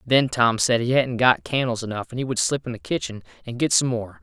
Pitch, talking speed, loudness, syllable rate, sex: 120 Hz, 270 wpm, -22 LUFS, 5.6 syllables/s, male